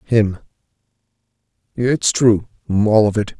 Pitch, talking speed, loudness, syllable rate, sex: 110 Hz, 105 wpm, -17 LUFS, 3.6 syllables/s, male